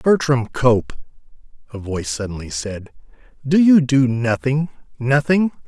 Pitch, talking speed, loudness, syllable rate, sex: 130 Hz, 105 wpm, -18 LUFS, 4.3 syllables/s, male